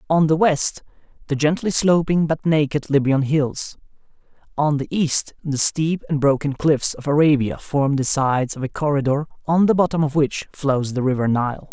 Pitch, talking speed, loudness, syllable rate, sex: 145 Hz, 180 wpm, -20 LUFS, 4.7 syllables/s, male